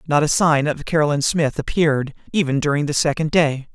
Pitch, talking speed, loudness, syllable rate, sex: 150 Hz, 190 wpm, -19 LUFS, 5.9 syllables/s, male